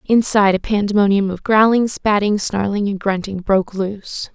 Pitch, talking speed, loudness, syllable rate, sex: 200 Hz, 150 wpm, -17 LUFS, 5.2 syllables/s, female